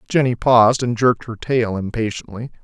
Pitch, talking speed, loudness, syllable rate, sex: 115 Hz, 160 wpm, -18 LUFS, 5.6 syllables/s, male